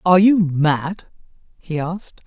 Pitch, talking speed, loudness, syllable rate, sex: 170 Hz, 130 wpm, -18 LUFS, 4.2 syllables/s, female